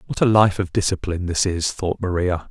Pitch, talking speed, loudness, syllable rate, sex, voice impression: 90 Hz, 215 wpm, -20 LUFS, 5.5 syllables/s, male, masculine, adult-like, slightly powerful, clear, fluent, cool, slightly sincere, calm, wild, slightly strict, slightly sharp